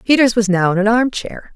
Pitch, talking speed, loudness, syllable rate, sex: 220 Hz, 270 wpm, -15 LUFS, 5.5 syllables/s, female